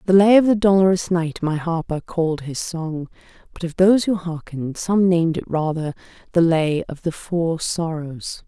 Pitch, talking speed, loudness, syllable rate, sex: 170 Hz, 185 wpm, -20 LUFS, 4.9 syllables/s, female